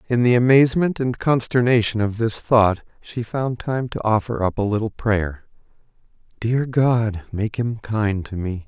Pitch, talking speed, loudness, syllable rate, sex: 115 Hz, 165 wpm, -20 LUFS, 4.3 syllables/s, male